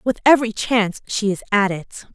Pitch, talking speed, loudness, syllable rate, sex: 215 Hz, 195 wpm, -19 LUFS, 6.3 syllables/s, female